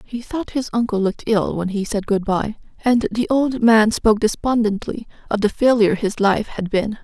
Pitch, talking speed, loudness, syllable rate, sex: 220 Hz, 205 wpm, -19 LUFS, 5.0 syllables/s, female